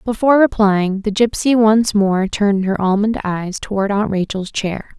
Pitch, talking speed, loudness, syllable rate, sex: 205 Hz, 170 wpm, -16 LUFS, 4.5 syllables/s, female